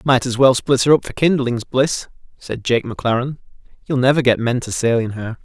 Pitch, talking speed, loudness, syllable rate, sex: 125 Hz, 220 wpm, -17 LUFS, 5.5 syllables/s, male